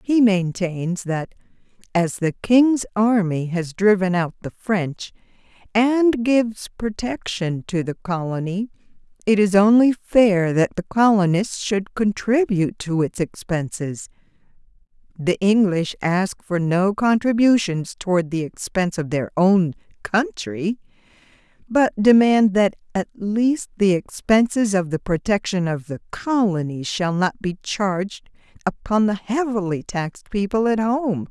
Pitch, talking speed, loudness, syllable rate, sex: 195 Hz, 130 wpm, -20 LUFS, 4.0 syllables/s, female